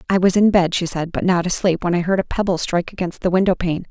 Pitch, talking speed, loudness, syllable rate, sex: 180 Hz, 290 wpm, -19 LUFS, 6.5 syllables/s, female